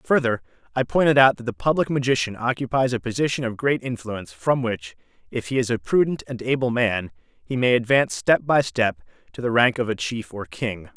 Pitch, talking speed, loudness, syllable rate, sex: 120 Hz, 210 wpm, -22 LUFS, 5.5 syllables/s, male